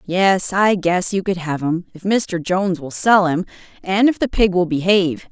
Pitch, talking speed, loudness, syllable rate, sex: 185 Hz, 215 wpm, -18 LUFS, 4.7 syllables/s, female